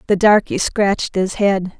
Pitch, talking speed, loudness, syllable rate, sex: 200 Hz, 165 wpm, -16 LUFS, 4.4 syllables/s, female